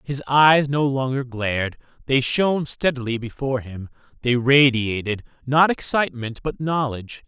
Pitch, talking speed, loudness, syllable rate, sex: 130 Hz, 130 wpm, -21 LUFS, 4.8 syllables/s, male